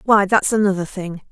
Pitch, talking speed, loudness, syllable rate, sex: 195 Hz, 185 wpm, -17 LUFS, 5.3 syllables/s, female